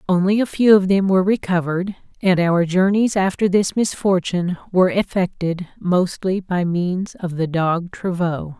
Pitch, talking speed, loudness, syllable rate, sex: 185 Hz, 155 wpm, -19 LUFS, 4.7 syllables/s, female